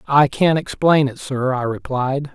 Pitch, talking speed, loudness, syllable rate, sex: 140 Hz, 180 wpm, -18 LUFS, 4.1 syllables/s, male